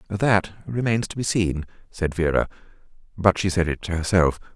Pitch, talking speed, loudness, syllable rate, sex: 90 Hz, 170 wpm, -23 LUFS, 5.1 syllables/s, male